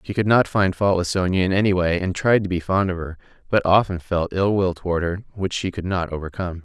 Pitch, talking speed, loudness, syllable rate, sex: 90 Hz, 260 wpm, -21 LUFS, 6.0 syllables/s, male